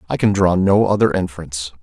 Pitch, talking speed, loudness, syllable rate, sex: 90 Hz, 195 wpm, -17 LUFS, 6.3 syllables/s, male